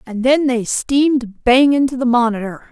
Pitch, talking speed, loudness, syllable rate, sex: 250 Hz, 175 wpm, -15 LUFS, 4.7 syllables/s, female